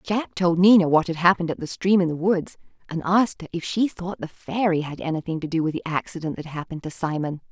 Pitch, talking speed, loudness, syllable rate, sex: 175 Hz, 245 wpm, -23 LUFS, 6.2 syllables/s, female